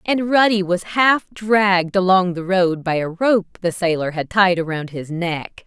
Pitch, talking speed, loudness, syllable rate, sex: 185 Hz, 190 wpm, -18 LUFS, 4.1 syllables/s, female